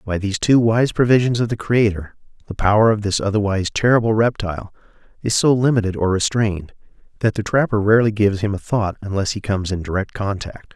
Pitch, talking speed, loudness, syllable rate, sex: 105 Hz, 190 wpm, -18 LUFS, 6.2 syllables/s, male